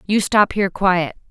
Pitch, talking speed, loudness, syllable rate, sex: 195 Hz, 185 wpm, -17 LUFS, 4.9 syllables/s, female